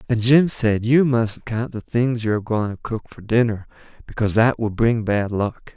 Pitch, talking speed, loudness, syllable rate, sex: 115 Hz, 220 wpm, -20 LUFS, 4.9 syllables/s, male